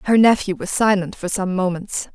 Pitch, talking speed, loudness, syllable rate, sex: 195 Hz, 195 wpm, -19 LUFS, 5.1 syllables/s, female